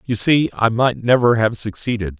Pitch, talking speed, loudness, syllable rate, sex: 110 Hz, 190 wpm, -17 LUFS, 5.0 syllables/s, male